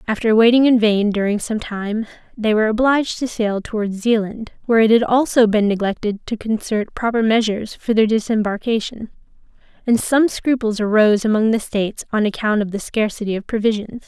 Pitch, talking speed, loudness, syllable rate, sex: 220 Hz, 175 wpm, -18 LUFS, 5.6 syllables/s, female